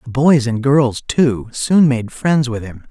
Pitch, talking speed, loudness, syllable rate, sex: 130 Hz, 205 wpm, -15 LUFS, 3.7 syllables/s, male